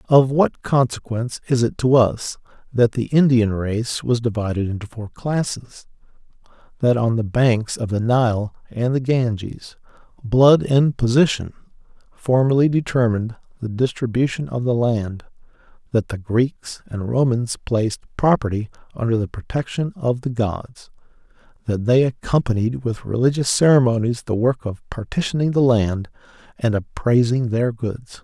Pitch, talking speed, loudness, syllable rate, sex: 120 Hz, 140 wpm, -20 LUFS, 4.6 syllables/s, male